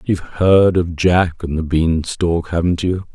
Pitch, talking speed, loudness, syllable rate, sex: 85 Hz, 190 wpm, -17 LUFS, 4.0 syllables/s, male